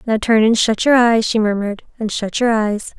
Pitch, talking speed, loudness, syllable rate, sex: 220 Hz, 240 wpm, -16 LUFS, 5.2 syllables/s, female